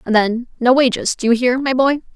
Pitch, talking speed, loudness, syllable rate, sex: 250 Hz, 250 wpm, -16 LUFS, 5.6 syllables/s, female